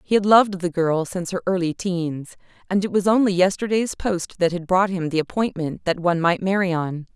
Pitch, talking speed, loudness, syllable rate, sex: 180 Hz, 220 wpm, -21 LUFS, 5.6 syllables/s, female